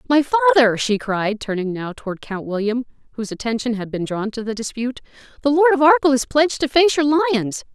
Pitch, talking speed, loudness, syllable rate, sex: 230 Hz, 210 wpm, -19 LUFS, 5.7 syllables/s, female